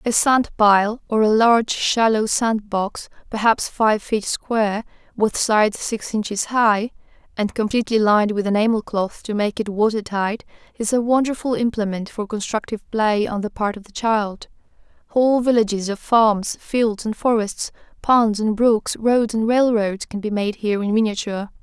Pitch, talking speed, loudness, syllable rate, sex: 220 Hz, 165 wpm, -20 LUFS, 4.7 syllables/s, female